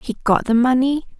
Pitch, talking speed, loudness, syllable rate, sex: 255 Hz, 200 wpm, -17 LUFS, 5.6 syllables/s, female